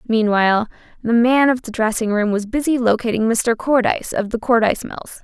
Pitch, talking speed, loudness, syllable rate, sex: 230 Hz, 185 wpm, -18 LUFS, 5.5 syllables/s, female